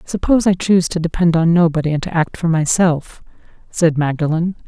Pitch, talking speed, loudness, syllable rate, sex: 165 Hz, 180 wpm, -16 LUFS, 5.7 syllables/s, female